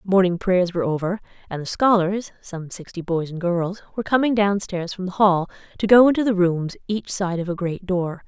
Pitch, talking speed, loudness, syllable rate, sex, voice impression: 185 Hz, 210 wpm, -21 LUFS, 5.2 syllables/s, female, very feminine, slightly young, thin, tensed, slightly powerful, bright, soft, very clear, very fluent, slightly raspy, very cute, intellectual, very refreshing, sincere, calm, very friendly, very reassuring, unique, elegant, slightly wild, very sweet, lively, kind, slightly modest, light